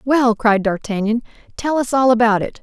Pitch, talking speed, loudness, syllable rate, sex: 230 Hz, 185 wpm, -17 LUFS, 5.0 syllables/s, female